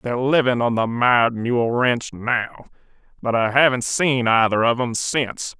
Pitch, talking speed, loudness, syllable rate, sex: 120 Hz, 170 wpm, -19 LUFS, 4.7 syllables/s, male